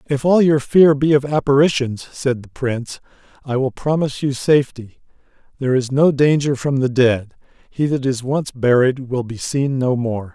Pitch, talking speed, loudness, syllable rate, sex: 135 Hz, 185 wpm, -17 LUFS, 4.8 syllables/s, male